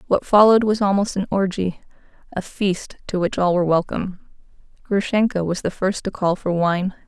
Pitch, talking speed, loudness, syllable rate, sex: 190 Hz, 180 wpm, -20 LUFS, 5.4 syllables/s, female